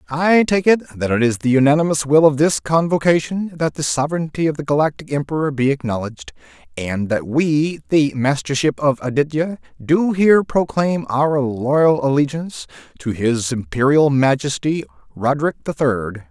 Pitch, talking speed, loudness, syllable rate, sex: 140 Hz, 150 wpm, -18 LUFS, 4.9 syllables/s, male